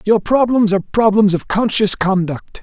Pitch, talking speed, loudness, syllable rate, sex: 205 Hz, 160 wpm, -15 LUFS, 4.7 syllables/s, male